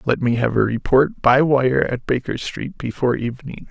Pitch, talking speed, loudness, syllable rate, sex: 125 Hz, 195 wpm, -19 LUFS, 5.0 syllables/s, male